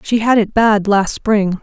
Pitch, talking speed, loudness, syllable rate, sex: 210 Hz, 220 wpm, -14 LUFS, 4.0 syllables/s, female